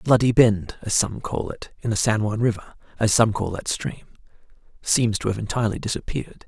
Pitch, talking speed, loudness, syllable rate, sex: 110 Hz, 205 wpm, -22 LUFS, 5.8 syllables/s, male